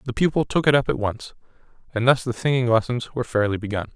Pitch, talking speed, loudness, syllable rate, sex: 120 Hz, 230 wpm, -22 LUFS, 6.5 syllables/s, male